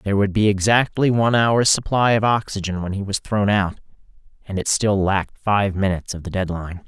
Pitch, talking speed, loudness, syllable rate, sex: 100 Hz, 200 wpm, -20 LUFS, 5.7 syllables/s, male